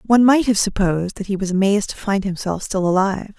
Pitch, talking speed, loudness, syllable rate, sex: 200 Hz, 230 wpm, -19 LUFS, 6.3 syllables/s, female